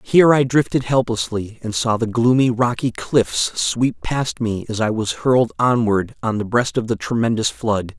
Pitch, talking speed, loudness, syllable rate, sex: 120 Hz, 190 wpm, -19 LUFS, 4.6 syllables/s, male